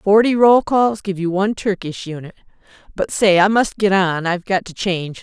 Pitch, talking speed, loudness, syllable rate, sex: 195 Hz, 195 wpm, -17 LUFS, 5.2 syllables/s, female